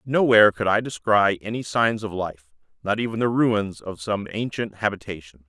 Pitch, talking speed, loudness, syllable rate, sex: 105 Hz, 175 wpm, -22 LUFS, 5.1 syllables/s, male